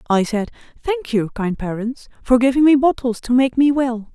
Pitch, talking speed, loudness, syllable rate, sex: 250 Hz, 205 wpm, -18 LUFS, 4.9 syllables/s, female